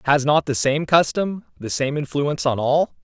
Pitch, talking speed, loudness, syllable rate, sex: 140 Hz, 200 wpm, -20 LUFS, 4.8 syllables/s, male